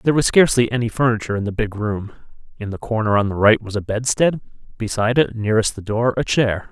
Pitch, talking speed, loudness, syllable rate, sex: 110 Hz, 225 wpm, -19 LUFS, 6.5 syllables/s, male